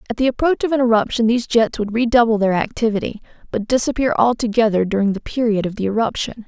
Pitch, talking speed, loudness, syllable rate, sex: 225 Hz, 195 wpm, -18 LUFS, 6.5 syllables/s, female